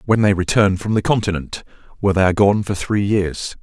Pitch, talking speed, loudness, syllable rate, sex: 100 Hz, 215 wpm, -18 LUFS, 5.8 syllables/s, male